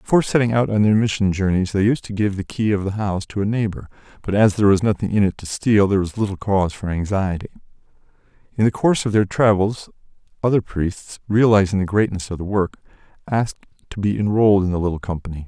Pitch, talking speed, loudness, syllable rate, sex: 100 Hz, 215 wpm, -19 LUFS, 6.5 syllables/s, male